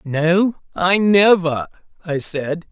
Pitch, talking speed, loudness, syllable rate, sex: 170 Hz, 110 wpm, -17 LUFS, 3.0 syllables/s, male